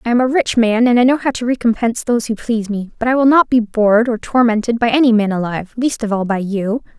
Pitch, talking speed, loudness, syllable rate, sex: 230 Hz, 265 wpm, -15 LUFS, 6.3 syllables/s, female